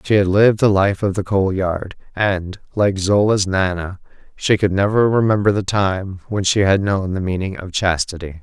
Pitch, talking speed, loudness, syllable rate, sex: 95 Hz, 190 wpm, -18 LUFS, 4.8 syllables/s, male